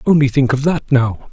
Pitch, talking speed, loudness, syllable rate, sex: 135 Hz, 225 wpm, -15 LUFS, 5.2 syllables/s, male